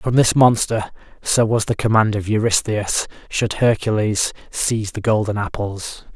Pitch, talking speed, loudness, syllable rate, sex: 110 Hz, 145 wpm, -19 LUFS, 4.5 syllables/s, male